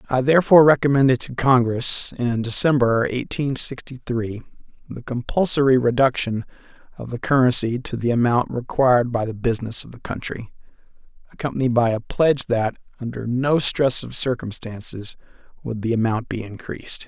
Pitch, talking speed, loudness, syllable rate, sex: 125 Hz, 145 wpm, -20 LUFS, 5.3 syllables/s, male